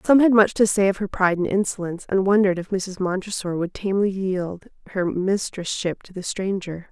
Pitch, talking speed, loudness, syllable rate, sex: 190 Hz, 210 wpm, -22 LUFS, 5.5 syllables/s, female